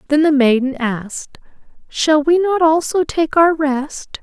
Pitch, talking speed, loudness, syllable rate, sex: 300 Hz, 155 wpm, -15 LUFS, 4.0 syllables/s, female